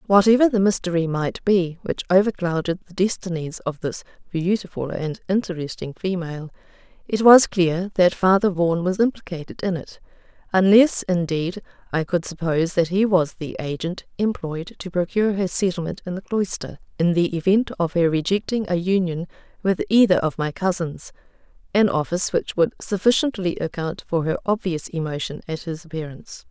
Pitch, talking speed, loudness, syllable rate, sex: 180 Hz, 155 wpm, -21 LUFS, 5.2 syllables/s, female